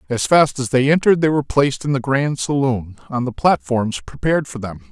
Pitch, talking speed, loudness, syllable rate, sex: 130 Hz, 220 wpm, -18 LUFS, 5.8 syllables/s, male